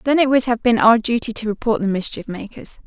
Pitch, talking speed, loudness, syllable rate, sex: 230 Hz, 250 wpm, -18 LUFS, 5.9 syllables/s, female